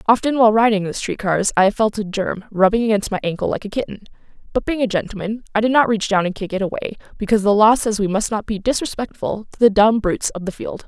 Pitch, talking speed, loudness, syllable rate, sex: 210 Hz, 265 wpm, -18 LUFS, 6.6 syllables/s, female